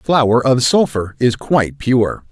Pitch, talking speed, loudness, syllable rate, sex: 125 Hz, 155 wpm, -15 LUFS, 4.1 syllables/s, male